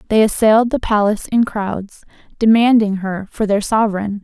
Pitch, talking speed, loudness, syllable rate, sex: 210 Hz, 155 wpm, -16 LUFS, 5.3 syllables/s, female